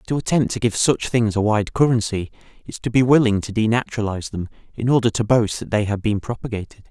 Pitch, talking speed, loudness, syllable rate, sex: 110 Hz, 215 wpm, -20 LUFS, 6.2 syllables/s, male